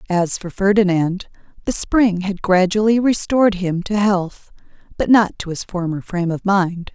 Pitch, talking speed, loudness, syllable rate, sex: 190 Hz, 165 wpm, -18 LUFS, 4.6 syllables/s, female